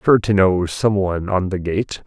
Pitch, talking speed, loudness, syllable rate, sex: 95 Hz, 205 wpm, -18 LUFS, 4.6 syllables/s, male